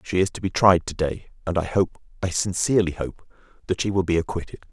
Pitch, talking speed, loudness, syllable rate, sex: 90 Hz, 215 wpm, -23 LUFS, 6.1 syllables/s, male